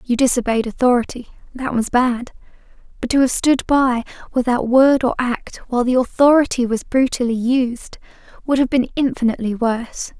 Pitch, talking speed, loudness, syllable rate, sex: 250 Hz, 145 wpm, -18 LUFS, 5.2 syllables/s, female